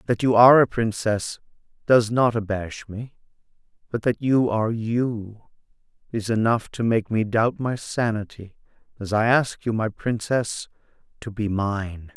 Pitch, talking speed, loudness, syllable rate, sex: 110 Hz, 155 wpm, -22 LUFS, 4.2 syllables/s, male